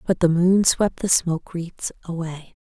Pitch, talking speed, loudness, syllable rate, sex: 175 Hz, 185 wpm, -21 LUFS, 4.3 syllables/s, female